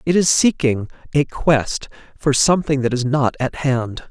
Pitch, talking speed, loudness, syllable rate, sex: 135 Hz, 175 wpm, -18 LUFS, 4.4 syllables/s, male